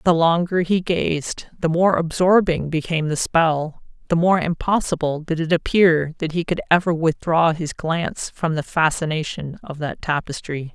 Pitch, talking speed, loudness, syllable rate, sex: 165 Hz, 155 wpm, -20 LUFS, 4.5 syllables/s, female